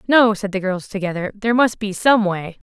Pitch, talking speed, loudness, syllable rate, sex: 205 Hz, 225 wpm, -19 LUFS, 5.4 syllables/s, female